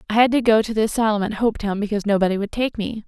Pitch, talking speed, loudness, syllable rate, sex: 215 Hz, 275 wpm, -20 LUFS, 7.7 syllables/s, female